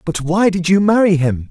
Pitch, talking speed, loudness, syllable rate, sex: 175 Hz, 240 wpm, -14 LUFS, 5.0 syllables/s, male